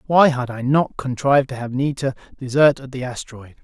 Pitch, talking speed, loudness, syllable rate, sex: 130 Hz, 200 wpm, -19 LUFS, 6.0 syllables/s, male